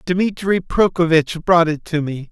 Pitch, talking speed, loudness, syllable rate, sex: 170 Hz, 155 wpm, -17 LUFS, 4.1 syllables/s, male